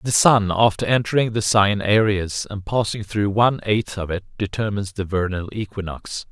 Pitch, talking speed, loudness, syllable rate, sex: 105 Hz, 170 wpm, -20 LUFS, 5.1 syllables/s, male